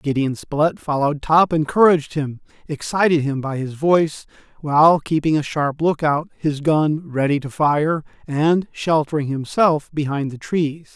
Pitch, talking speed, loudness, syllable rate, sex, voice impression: 150 Hz, 155 wpm, -19 LUFS, 4.5 syllables/s, male, very masculine, slightly middle-aged, slightly wild, slightly sweet